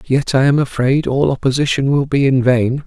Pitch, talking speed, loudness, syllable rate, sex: 135 Hz, 210 wpm, -15 LUFS, 5.1 syllables/s, male